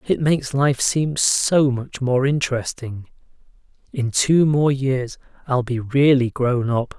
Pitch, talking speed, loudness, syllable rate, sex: 130 Hz, 145 wpm, -19 LUFS, 3.8 syllables/s, male